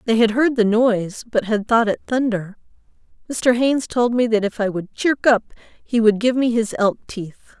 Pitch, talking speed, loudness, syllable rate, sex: 225 Hz, 215 wpm, -19 LUFS, 5.0 syllables/s, female